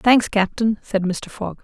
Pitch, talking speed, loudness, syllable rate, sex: 210 Hz, 185 wpm, -20 LUFS, 3.9 syllables/s, female